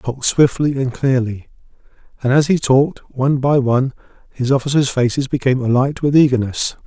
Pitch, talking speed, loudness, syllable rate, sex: 130 Hz, 165 wpm, -16 LUFS, 5.9 syllables/s, male